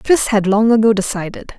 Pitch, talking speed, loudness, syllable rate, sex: 215 Hz, 190 wpm, -14 LUFS, 5.6 syllables/s, female